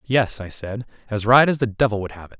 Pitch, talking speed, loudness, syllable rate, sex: 110 Hz, 275 wpm, -20 LUFS, 5.8 syllables/s, male